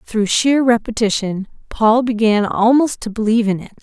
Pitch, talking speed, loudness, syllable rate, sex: 225 Hz, 155 wpm, -16 LUFS, 5.0 syllables/s, female